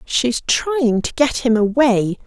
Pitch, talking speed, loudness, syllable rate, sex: 245 Hz, 160 wpm, -17 LUFS, 3.4 syllables/s, female